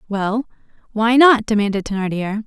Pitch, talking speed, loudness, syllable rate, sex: 215 Hz, 120 wpm, -17 LUFS, 4.9 syllables/s, female